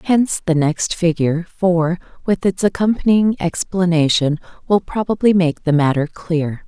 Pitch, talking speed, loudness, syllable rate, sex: 175 Hz, 135 wpm, -17 LUFS, 5.0 syllables/s, female